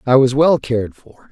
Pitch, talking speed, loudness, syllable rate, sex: 130 Hz, 225 wpm, -15 LUFS, 5.0 syllables/s, male